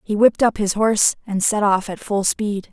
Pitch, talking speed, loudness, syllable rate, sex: 205 Hz, 245 wpm, -18 LUFS, 5.2 syllables/s, female